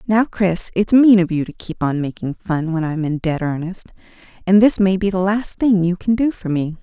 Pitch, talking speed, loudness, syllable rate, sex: 185 Hz, 245 wpm, -17 LUFS, 5.0 syllables/s, female